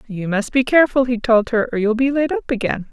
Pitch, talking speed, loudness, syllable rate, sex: 235 Hz, 265 wpm, -17 LUFS, 5.8 syllables/s, female